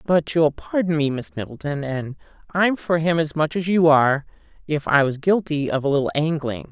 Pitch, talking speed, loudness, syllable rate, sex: 155 Hz, 190 wpm, -21 LUFS, 5.2 syllables/s, female